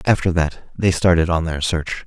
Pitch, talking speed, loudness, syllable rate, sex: 85 Hz, 205 wpm, -19 LUFS, 4.7 syllables/s, male